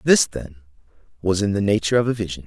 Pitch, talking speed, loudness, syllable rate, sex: 100 Hz, 220 wpm, -20 LUFS, 7.0 syllables/s, male